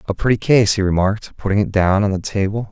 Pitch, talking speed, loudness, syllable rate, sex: 105 Hz, 245 wpm, -17 LUFS, 6.3 syllables/s, male